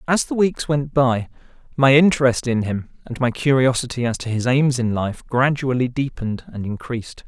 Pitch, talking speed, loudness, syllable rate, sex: 130 Hz, 180 wpm, -20 LUFS, 5.1 syllables/s, male